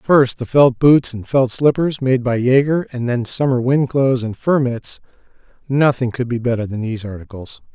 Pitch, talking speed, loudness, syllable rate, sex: 125 Hz, 185 wpm, -17 LUFS, 4.9 syllables/s, male